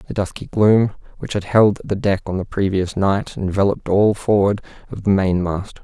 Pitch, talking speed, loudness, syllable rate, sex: 100 Hz, 195 wpm, -19 LUFS, 4.9 syllables/s, male